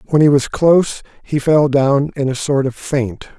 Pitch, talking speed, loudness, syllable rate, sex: 140 Hz, 215 wpm, -15 LUFS, 4.7 syllables/s, male